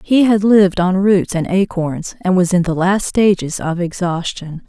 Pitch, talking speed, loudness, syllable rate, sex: 185 Hz, 190 wpm, -15 LUFS, 4.5 syllables/s, female